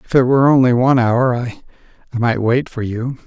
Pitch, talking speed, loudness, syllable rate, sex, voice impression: 125 Hz, 200 wpm, -15 LUFS, 5.4 syllables/s, male, very masculine, very adult-like, slightly old, thin, slightly tensed, powerful, bright, slightly soft, slightly clear, slightly halting, cool, very intellectual, refreshing, very sincere, very calm, very mature, friendly, very reassuring, unique, slightly elegant, very wild, slightly sweet, slightly lively, very kind